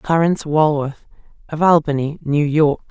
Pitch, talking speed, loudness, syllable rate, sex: 150 Hz, 125 wpm, -17 LUFS, 4.7 syllables/s, female